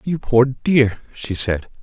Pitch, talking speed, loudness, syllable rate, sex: 125 Hz, 165 wpm, -18 LUFS, 3.3 syllables/s, male